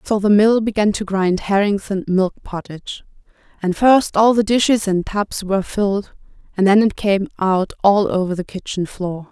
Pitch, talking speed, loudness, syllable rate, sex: 200 Hz, 185 wpm, -17 LUFS, 4.8 syllables/s, female